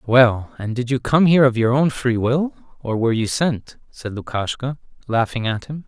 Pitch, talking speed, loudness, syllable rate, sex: 125 Hz, 205 wpm, -19 LUFS, 4.8 syllables/s, male